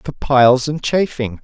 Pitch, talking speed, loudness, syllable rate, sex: 135 Hz, 165 wpm, -15 LUFS, 4.5 syllables/s, male